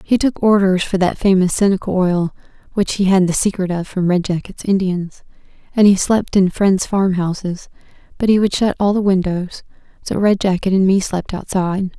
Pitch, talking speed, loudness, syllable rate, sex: 190 Hz, 190 wpm, -16 LUFS, 5.1 syllables/s, female